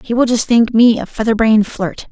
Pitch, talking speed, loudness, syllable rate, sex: 225 Hz, 255 wpm, -13 LUFS, 5.5 syllables/s, female